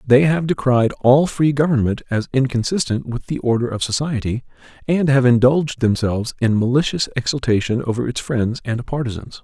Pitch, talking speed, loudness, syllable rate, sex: 125 Hz, 160 wpm, -18 LUFS, 5.4 syllables/s, male